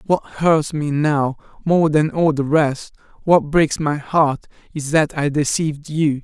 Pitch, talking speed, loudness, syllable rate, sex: 150 Hz, 175 wpm, -18 LUFS, 3.9 syllables/s, male